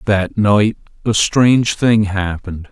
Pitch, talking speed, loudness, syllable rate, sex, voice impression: 105 Hz, 130 wpm, -15 LUFS, 3.9 syllables/s, male, very masculine, adult-like, thick, cool, sincere, calm, slightly mature